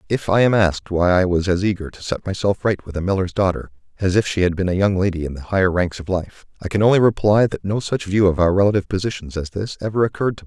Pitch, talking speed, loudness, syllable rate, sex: 95 Hz, 280 wpm, -19 LUFS, 6.7 syllables/s, male